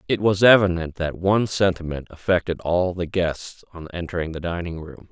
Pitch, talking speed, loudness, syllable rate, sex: 90 Hz, 175 wpm, -22 LUFS, 5.3 syllables/s, male